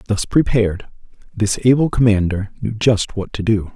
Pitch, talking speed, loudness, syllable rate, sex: 110 Hz, 160 wpm, -17 LUFS, 5.0 syllables/s, male